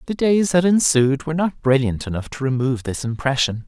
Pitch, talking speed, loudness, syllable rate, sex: 140 Hz, 195 wpm, -19 LUFS, 5.7 syllables/s, male